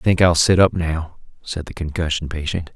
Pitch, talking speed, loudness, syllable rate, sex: 80 Hz, 220 wpm, -19 LUFS, 5.2 syllables/s, male